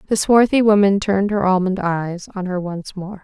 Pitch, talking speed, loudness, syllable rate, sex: 195 Hz, 205 wpm, -17 LUFS, 5.1 syllables/s, female